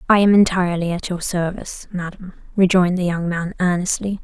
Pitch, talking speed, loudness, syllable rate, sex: 180 Hz, 170 wpm, -19 LUFS, 6.1 syllables/s, female